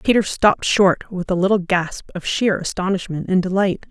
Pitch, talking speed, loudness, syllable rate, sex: 185 Hz, 185 wpm, -19 LUFS, 5.1 syllables/s, female